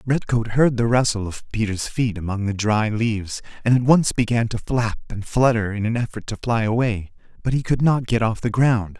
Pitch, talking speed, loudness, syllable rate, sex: 115 Hz, 220 wpm, -21 LUFS, 5.2 syllables/s, male